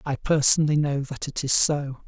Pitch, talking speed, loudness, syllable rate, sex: 145 Hz, 205 wpm, -22 LUFS, 5.2 syllables/s, male